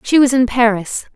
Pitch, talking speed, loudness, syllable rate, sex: 245 Hz, 210 wpm, -14 LUFS, 5.2 syllables/s, female